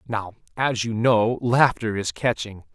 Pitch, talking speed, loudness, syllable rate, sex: 115 Hz, 155 wpm, -22 LUFS, 4.1 syllables/s, male